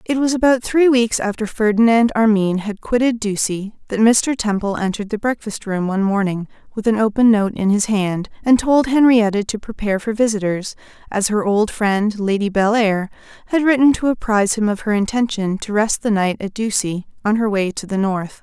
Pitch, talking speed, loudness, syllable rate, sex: 215 Hz, 195 wpm, -18 LUFS, 5.3 syllables/s, female